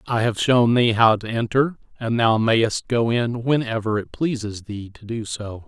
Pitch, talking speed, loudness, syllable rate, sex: 115 Hz, 200 wpm, -21 LUFS, 4.3 syllables/s, male